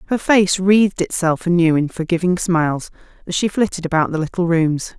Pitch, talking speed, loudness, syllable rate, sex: 175 Hz, 180 wpm, -17 LUFS, 5.5 syllables/s, female